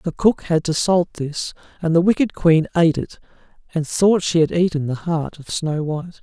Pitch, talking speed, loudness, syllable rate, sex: 165 Hz, 210 wpm, -19 LUFS, 5.1 syllables/s, male